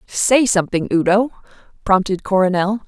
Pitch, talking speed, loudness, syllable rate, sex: 200 Hz, 105 wpm, -17 LUFS, 5.2 syllables/s, female